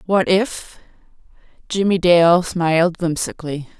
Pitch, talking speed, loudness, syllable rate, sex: 175 Hz, 80 wpm, -17 LUFS, 4.2 syllables/s, female